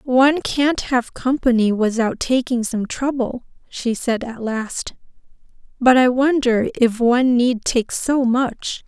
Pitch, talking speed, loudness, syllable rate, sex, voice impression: 245 Hz, 140 wpm, -18 LUFS, 3.8 syllables/s, female, feminine, adult-like, tensed, powerful, bright, clear, intellectual, calm, friendly, slightly unique, lively, kind, slightly modest